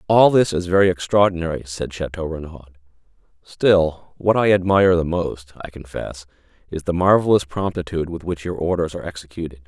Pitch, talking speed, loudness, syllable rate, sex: 85 Hz, 160 wpm, -20 LUFS, 5.7 syllables/s, male